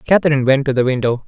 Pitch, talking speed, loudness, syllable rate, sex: 140 Hz, 235 wpm, -15 LUFS, 7.7 syllables/s, male